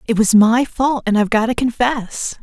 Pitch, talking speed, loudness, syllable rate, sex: 230 Hz, 225 wpm, -16 LUFS, 4.9 syllables/s, female